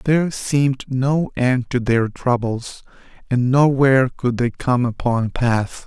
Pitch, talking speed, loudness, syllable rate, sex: 125 Hz, 155 wpm, -19 LUFS, 4.0 syllables/s, male